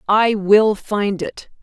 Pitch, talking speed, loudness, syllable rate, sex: 215 Hz, 150 wpm, -17 LUFS, 2.9 syllables/s, female